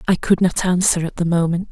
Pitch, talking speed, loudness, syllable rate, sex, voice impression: 175 Hz, 245 wpm, -18 LUFS, 5.8 syllables/s, female, feminine, adult-like, thin, relaxed, slightly weak, slightly dark, muffled, raspy, calm, slightly sharp, modest